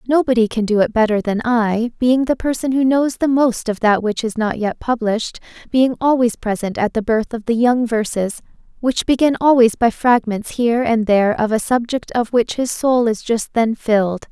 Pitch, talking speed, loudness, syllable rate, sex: 235 Hz, 210 wpm, -17 LUFS, 5.0 syllables/s, female